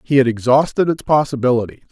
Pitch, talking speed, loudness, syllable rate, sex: 135 Hz, 155 wpm, -16 LUFS, 6.4 syllables/s, male